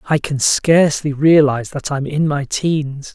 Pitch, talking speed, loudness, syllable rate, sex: 145 Hz, 170 wpm, -16 LUFS, 4.4 syllables/s, male